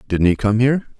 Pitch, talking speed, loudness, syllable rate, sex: 115 Hz, 240 wpm, -17 LUFS, 6.9 syllables/s, male